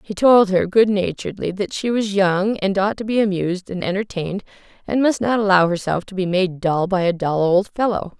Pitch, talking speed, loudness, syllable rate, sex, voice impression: 195 Hz, 220 wpm, -19 LUFS, 5.4 syllables/s, female, gender-neutral, slightly adult-like, slightly calm, friendly, kind